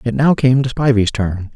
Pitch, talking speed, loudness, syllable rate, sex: 120 Hz, 230 wpm, -15 LUFS, 4.9 syllables/s, male